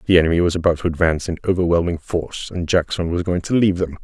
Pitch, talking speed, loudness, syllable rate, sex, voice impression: 85 Hz, 240 wpm, -19 LUFS, 7.1 syllables/s, male, masculine, adult-like, slightly thick, slightly fluent, cool, intellectual, slightly calm